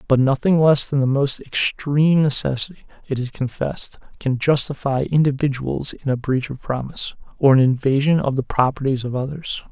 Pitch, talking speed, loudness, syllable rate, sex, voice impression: 140 Hz, 165 wpm, -20 LUFS, 5.4 syllables/s, male, masculine, very adult-like, middle-aged, thick, very relaxed, weak, dark, very soft, very muffled, slightly fluent, slightly cool, slightly intellectual, very sincere, very calm, slightly mature, slightly friendly, very unique, elegant, sweet, very kind, very modest